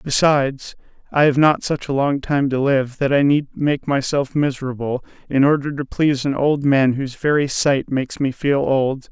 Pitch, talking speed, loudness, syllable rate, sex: 140 Hz, 195 wpm, -19 LUFS, 4.9 syllables/s, male